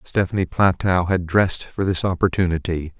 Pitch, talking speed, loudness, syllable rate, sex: 90 Hz, 140 wpm, -20 LUFS, 5.3 syllables/s, male